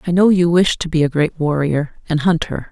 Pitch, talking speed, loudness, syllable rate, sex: 165 Hz, 245 wpm, -16 LUFS, 5.2 syllables/s, female